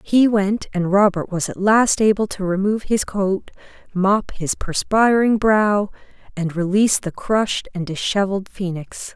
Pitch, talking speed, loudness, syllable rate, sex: 200 Hz, 150 wpm, -19 LUFS, 4.5 syllables/s, female